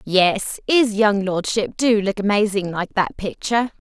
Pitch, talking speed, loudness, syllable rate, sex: 205 Hz, 155 wpm, -19 LUFS, 4.2 syllables/s, female